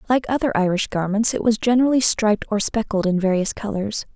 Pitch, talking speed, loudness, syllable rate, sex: 215 Hz, 190 wpm, -20 LUFS, 6.1 syllables/s, female